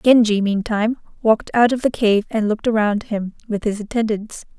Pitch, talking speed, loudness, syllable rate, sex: 220 Hz, 185 wpm, -19 LUFS, 5.5 syllables/s, female